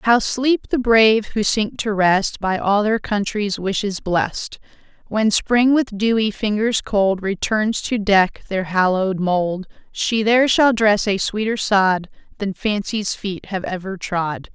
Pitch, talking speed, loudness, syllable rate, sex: 205 Hz, 160 wpm, -19 LUFS, 3.8 syllables/s, female